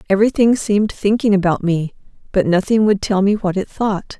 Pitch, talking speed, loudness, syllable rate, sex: 200 Hz, 185 wpm, -16 LUFS, 5.5 syllables/s, female